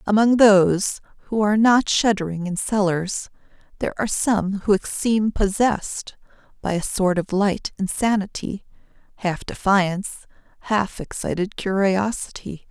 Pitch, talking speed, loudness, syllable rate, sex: 200 Hz, 120 wpm, -21 LUFS, 4.5 syllables/s, female